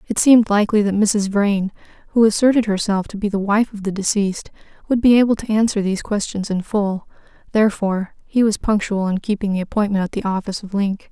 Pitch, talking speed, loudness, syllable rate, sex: 205 Hz, 205 wpm, -18 LUFS, 6.1 syllables/s, female